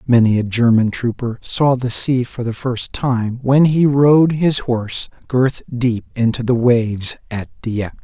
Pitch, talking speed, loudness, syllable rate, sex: 120 Hz, 170 wpm, -16 LUFS, 4.2 syllables/s, male